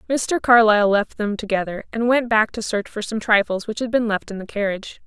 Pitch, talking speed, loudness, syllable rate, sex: 215 Hz, 235 wpm, -20 LUFS, 5.7 syllables/s, female